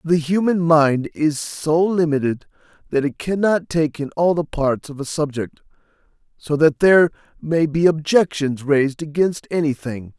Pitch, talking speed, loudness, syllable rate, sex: 155 Hz, 160 wpm, -19 LUFS, 4.5 syllables/s, male